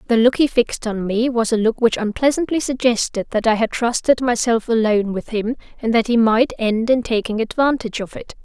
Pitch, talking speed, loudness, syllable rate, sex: 230 Hz, 215 wpm, -18 LUFS, 5.6 syllables/s, female